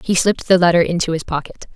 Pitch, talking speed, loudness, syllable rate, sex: 175 Hz, 240 wpm, -16 LUFS, 7.4 syllables/s, female